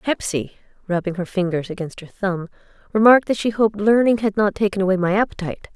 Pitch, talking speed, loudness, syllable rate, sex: 195 Hz, 190 wpm, -20 LUFS, 6.4 syllables/s, female